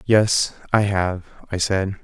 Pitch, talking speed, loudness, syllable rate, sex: 100 Hz, 145 wpm, -21 LUFS, 3.4 syllables/s, male